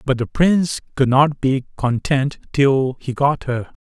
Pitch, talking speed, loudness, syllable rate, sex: 135 Hz, 170 wpm, -18 LUFS, 4.0 syllables/s, male